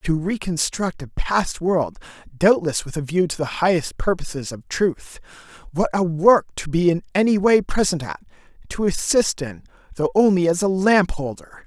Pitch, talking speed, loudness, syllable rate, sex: 175 Hz, 170 wpm, -20 LUFS, 4.6 syllables/s, male